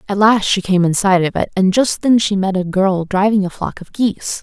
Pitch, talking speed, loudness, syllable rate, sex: 195 Hz, 270 wpm, -15 LUFS, 5.2 syllables/s, female